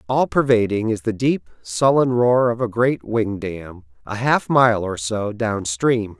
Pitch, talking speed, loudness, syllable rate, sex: 110 Hz, 185 wpm, -19 LUFS, 3.9 syllables/s, male